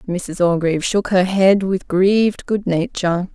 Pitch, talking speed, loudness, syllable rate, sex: 185 Hz, 160 wpm, -17 LUFS, 4.4 syllables/s, female